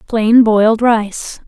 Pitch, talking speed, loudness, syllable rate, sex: 220 Hz, 120 wpm, -12 LUFS, 3.1 syllables/s, female